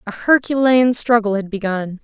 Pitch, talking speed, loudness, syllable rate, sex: 225 Hz, 145 wpm, -16 LUFS, 4.7 syllables/s, female